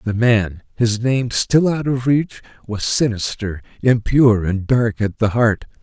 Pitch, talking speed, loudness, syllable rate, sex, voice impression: 115 Hz, 165 wpm, -18 LUFS, 4.0 syllables/s, male, masculine, middle-aged, slightly relaxed, soft, slightly fluent, slightly raspy, intellectual, calm, friendly, wild, kind, modest